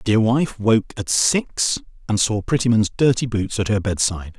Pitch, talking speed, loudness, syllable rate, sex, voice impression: 110 Hz, 190 wpm, -19 LUFS, 4.9 syllables/s, male, masculine, middle-aged, thick, slightly relaxed, powerful, hard, raspy, intellectual, sincere, calm, mature, wild, lively